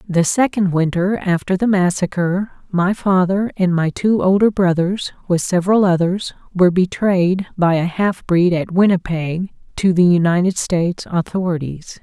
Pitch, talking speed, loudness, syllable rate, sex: 180 Hz, 145 wpm, -17 LUFS, 4.6 syllables/s, female